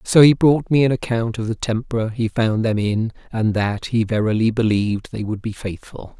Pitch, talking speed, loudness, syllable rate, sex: 115 Hz, 215 wpm, -19 LUFS, 5.0 syllables/s, male